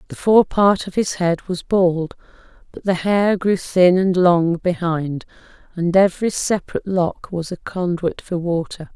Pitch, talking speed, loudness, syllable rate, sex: 180 Hz, 170 wpm, -19 LUFS, 4.3 syllables/s, female